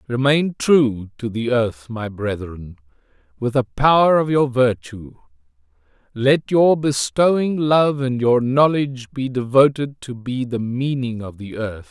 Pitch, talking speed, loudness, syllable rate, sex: 125 Hz, 145 wpm, -19 LUFS, 4.0 syllables/s, male